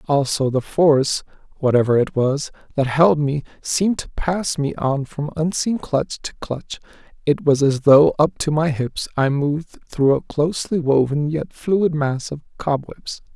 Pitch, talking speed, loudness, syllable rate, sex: 145 Hz, 170 wpm, -19 LUFS, 4.3 syllables/s, male